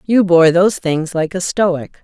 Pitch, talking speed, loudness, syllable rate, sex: 175 Hz, 205 wpm, -14 LUFS, 4.3 syllables/s, female